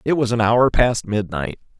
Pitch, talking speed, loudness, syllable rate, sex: 115 Hz, 200 wpm, -19 LUFS, 4.6 syllables/s, male